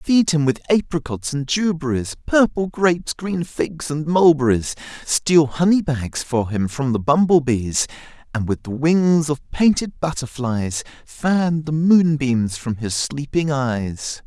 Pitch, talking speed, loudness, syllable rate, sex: 145 Hz, 145 wpm, -19 LUFS, 3.8 syllables/s, male